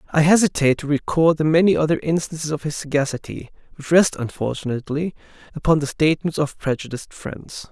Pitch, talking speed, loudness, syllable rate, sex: 155 Hz, 155 wpm, -20 LUFS, 6.2 syllables/s, male